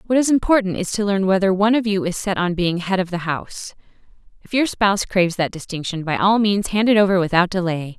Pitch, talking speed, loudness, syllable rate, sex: 190 Hz, 240 wpm, -19 LUFS, 6.1 syllables/s, female